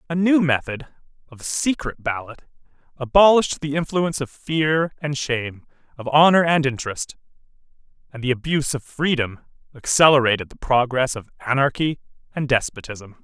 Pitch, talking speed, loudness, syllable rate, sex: 140 Hz, 130 wpm, -20 LUFS, 5.3 syllables/s, male